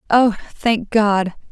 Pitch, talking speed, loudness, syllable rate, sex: 215 Hz, 120 wpm, -18 LUFS, 3.0 syllables/s, female